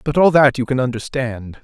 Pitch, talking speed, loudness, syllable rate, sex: 130 Hz, 220 wpm, -17 LUFS, 5.2 syllables/s, male